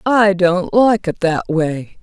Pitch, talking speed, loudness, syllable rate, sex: 190 Hz, 180 wpm, -15 LUFS, 3.2 syllables/s, female